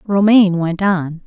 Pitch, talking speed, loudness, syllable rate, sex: 185 Hz, 145 wpm, -14 LUFS, 4.3 syllables/s, female